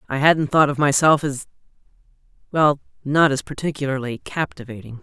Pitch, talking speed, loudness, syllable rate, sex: 140 Hz, 120 wpm, -20 LUFS, 5.3 syllables/s, female